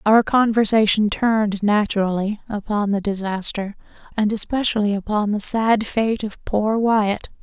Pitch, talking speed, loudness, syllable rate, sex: 210 Hz, 130 wpm, -20 LUFS, 4.4 syllables/s, female